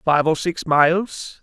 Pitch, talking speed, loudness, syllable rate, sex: 165 Hz, 170 wpm, -18 LUFS, 3.6 syllables/s, male